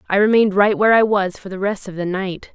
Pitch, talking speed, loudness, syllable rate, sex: 200 Hz, 285 wpm, -17 LUFS, 6.3 syllables/s, female